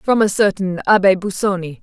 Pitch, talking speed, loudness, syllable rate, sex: 195 Hz, 165 wpm, -16 LUFS, 5.2 syllables/s, female